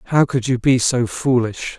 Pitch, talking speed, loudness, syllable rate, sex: 125 Hz, 200 wpm, -18 LUFS, 4.5 syllables/s, male